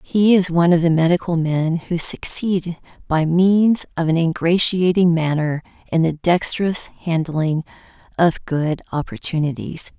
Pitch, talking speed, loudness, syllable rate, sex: 170 Hz, 130 wpm, -19 LUFS, 4.3 syllables/s, female